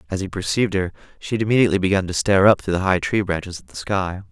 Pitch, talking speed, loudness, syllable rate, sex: 95 Hz, 265 wpm, -20 LUFS, 7.4 syllables/s, male